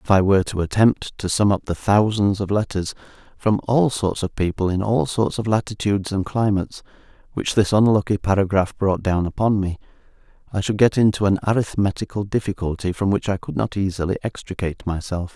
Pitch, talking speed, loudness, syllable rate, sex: 100 Hz, 185 wpm, -21 LUFS, 5.6 syllables/s, male